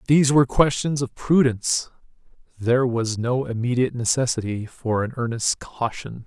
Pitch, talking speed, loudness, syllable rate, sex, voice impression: 125 Hz, 135 wpm, -22 LUFS, 5.2 syllables/s, male, masculine, adult-like, tensed, hard, slightly fluent, cool, intellectual, friendly, reassuring, wild, kind, slightly modest